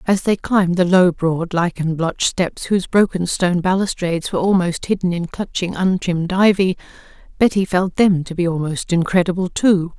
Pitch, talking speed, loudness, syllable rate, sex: 180 Hz, 170 wpm, -18 LUFS, 5.3 syllables/s, female